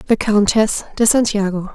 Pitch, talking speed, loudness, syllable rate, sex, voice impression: 210 Hz, 135 wpm, -16 LUFS, 4.9 syllables/s, female, feminine, young, thin, relaxed, weak, soft, cute, slightly calm, slightly friendly, elegant, slightly sweet, kind, modest